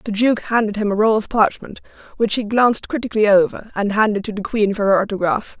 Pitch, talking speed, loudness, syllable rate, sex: 210 Hz, 225 wpm, -18 LUFS, 6.1 syllables/s, female